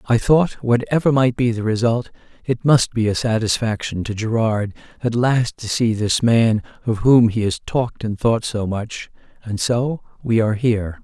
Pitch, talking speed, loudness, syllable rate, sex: 115 Hz, 180 wpm, -19 LUFS, 4.7 syllables/s, male